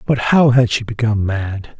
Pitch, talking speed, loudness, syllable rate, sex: 115 Hz, 200 wpm, -16 LUFS, 4.9 syllables/s, male